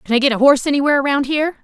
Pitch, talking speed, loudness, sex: 275 Hz, 295 wpm, -15 LUFS, female